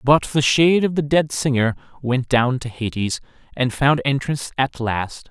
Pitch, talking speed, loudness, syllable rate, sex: 130 Hz, 180 wpm, -20 LUFS, 4.6 syllables/s, male